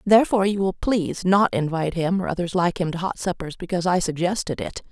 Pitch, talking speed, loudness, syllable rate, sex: 180 Hz, 220 wpm, -22 LUFS, 6.3 syllables/s, female